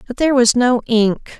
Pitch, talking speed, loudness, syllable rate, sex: 240 Hz, 215 wpm, -15 LUFS, 5.3 syllables/s, female